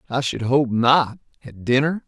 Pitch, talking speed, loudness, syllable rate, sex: 130 Hz, 145 wpm, -19 LUFS, 4.3 syllables/s, male